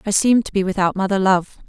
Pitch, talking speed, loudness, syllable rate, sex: 195 Hz, 250 wpm, -18 LUFS, 6.8 syllables/s, female